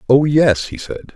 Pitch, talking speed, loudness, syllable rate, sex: 125 Hz, 205 wpm, -15 LUFS, 4.1 syllables/s, male